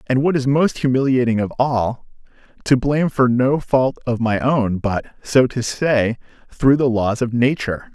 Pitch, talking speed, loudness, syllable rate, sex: 125 Hz, 180 wpm, -18 LUFS, 4.4 syllables/s, male